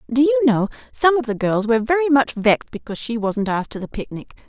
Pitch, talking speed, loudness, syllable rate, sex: 245 Hz, 240 wpm, -19 LUFS, 6.6 syllables/s, female